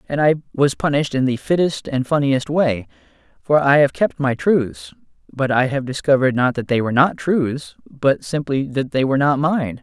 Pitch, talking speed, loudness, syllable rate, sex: 140 Hz, 200 wpm, -18 LUFS, 5.1 syllables/s, male